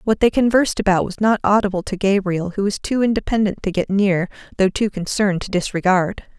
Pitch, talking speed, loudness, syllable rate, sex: 200 Hz, 195 wpm, -19 LUFS, 5.8 syllables/s, female